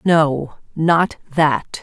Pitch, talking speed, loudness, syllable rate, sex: 155 Hz, 100 wpm, -18 LUFS, 2.2 syllables/s, female